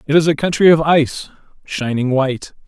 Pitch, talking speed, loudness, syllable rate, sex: 145 Hz, 180 wpm, -15 LUFS, 5.8 syllables/s, male